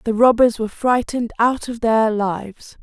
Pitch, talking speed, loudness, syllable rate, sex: 230 Hz, 170 wpm, -18 LUFS, 4.9 syllables/s, female